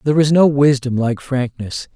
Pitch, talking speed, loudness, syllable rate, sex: 135 Hz, 185 wpm, -16 LUFS, 5.0 syllables/s, male